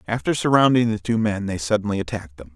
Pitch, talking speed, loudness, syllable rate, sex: 105 Hz, 210 wpm, -21 LUFS, 6.8 syllables/s, male